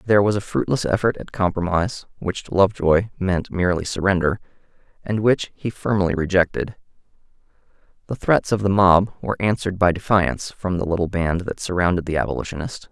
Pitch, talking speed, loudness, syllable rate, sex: 95 Hz, 165 wpm, -21 LUFS, 5.9 syllables/s, male